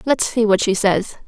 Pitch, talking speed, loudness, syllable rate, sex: 210 Hz, 235 wpm, -17 LUFS, 4.7 syllables/s, female